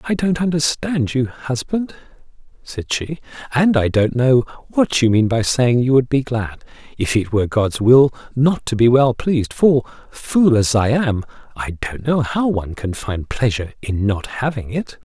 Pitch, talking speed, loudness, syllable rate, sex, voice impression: 125 Hz, 185 wpm, -18 LUFS, 4.5 syllables/s, male, masculine, adult-like, tensed, powerful, slightly bright, slightly soft, clear, cool, slightly intellectual, wild, lively, slightly kind, slightly light